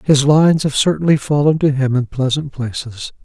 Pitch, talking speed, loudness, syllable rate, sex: 140 Hz, 185 wpm, -15 LUFS, 5.2 syllables/s, male